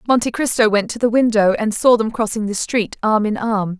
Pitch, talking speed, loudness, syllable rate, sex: 220 Hz, 235 wpm, -17 LUFS, 5.4 syllables/s, female